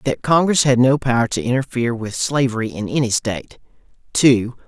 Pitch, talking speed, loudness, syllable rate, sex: 125 Hz, 165 wpm, -18 LUFS, 5.6 syllables/s, male